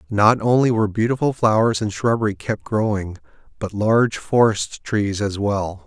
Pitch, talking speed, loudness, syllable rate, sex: 110 Hz, 155 wpm, -19 LUFS, 4.8 syllables/s, male